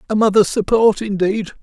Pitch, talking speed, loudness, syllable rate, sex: 205 Hz, 150 wpm, -16 LUFS, 5.2 syllables/s, male